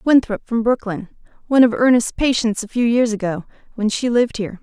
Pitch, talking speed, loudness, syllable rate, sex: 230 Hz, 195 wpm, -18 LUFS, 6.1 syllables/s, female